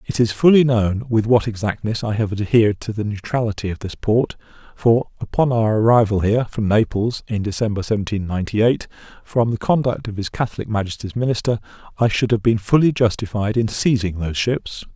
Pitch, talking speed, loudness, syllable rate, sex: 110 Hz, 185 wpm, -19 LUFS, 5.7 syllables/s, male